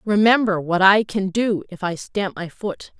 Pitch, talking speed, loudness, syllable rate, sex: 195 Hz, 200 wpm, -20 LUFS, 4.3 syllables/s, female